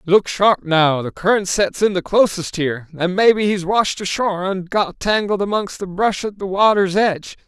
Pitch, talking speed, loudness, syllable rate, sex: 190 Hz, 200 wpm, -18 LUFS, 4.9 syllables/s, male